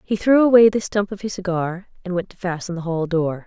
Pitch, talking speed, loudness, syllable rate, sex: 190 Hz, 260 wpm, -20 LUFS, 5.7 syllables/s, female